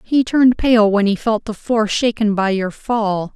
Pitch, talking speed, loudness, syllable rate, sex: 220 Hz, 215 wpm, -16 LUFS, 4.3 syllables/s, female